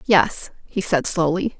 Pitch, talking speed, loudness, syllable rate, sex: 180 Hz, 150 wpm, -20 LUFS, 3.7 syllables/s, female